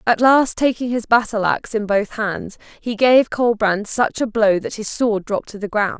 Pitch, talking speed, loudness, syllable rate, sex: 220 Hz, 220 wpm, -18 LUFS, 4.8 syllables/s, female